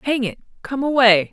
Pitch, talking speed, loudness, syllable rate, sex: 245 Hz, 180 wpm, -18 LUFS, 5.4 syllables/s, female